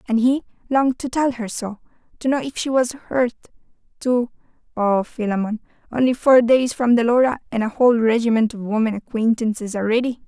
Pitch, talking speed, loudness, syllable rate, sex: 235 Hz, 160 wpm, -20 LUFS, 5.7 syllables/s, female